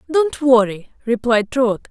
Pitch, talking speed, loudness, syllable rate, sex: 250 Hz, 125 wpm, -17 LUFS, 4.2 syllables/s, female